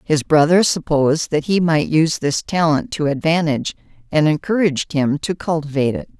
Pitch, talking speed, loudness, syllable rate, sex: 155 Hz, 165 wpm, -17 LUFS, 5.5 syllables/s, female